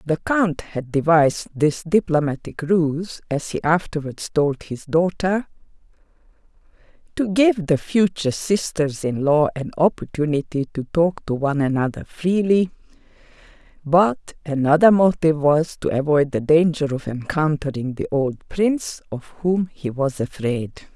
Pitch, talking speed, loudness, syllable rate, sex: 160 Hz, 130 wpm, -20 LUFS, 4.0 syllables/s, female